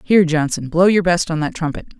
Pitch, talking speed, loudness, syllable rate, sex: 170 Hz, 240 wpm, -17 LUFS, 6.2 syllables/s, female